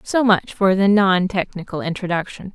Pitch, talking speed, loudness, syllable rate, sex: 190 Hz, 165 wpm, -18 LUFS, 4.9 syllables/s, female